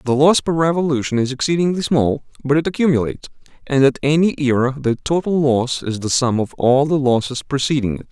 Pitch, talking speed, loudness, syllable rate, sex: 140 Hz, 190 wpm, -17 LUFS, 5.8 syllables/s, male